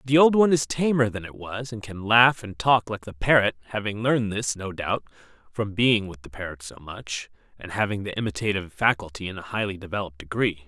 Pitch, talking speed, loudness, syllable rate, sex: 105 Hz, 215 wpm, -24 LUFS, 5.8 syllables/s, male